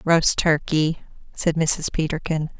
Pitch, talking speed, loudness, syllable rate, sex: 160 Hz, 115 wpm, -21 LUFS, 3.8 syllables/s, female